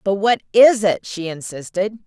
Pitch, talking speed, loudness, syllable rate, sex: 200 Hz, 175 wpm, -17 LUFS, 4.4 syllables/s, female